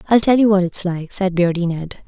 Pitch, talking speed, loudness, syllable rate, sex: 185 Hz, 260 wpm, -17 LUFS, 5.5 syllables/s, female